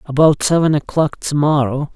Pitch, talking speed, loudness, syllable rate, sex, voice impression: 145 Hz, 155 wpm, -16 LUFS, 4.9 syllables/s, male, very masculine, old, slightly thick, relaxed, slightly weak, slightly dark, very soft, very clear, slightly muffled, slightly halting, cool, intellectual, very sincere, very calm, very mature, friendly, reassuring, unique, elegant, slightly wild, slightly sweet, slightly lively, kind, slightly modest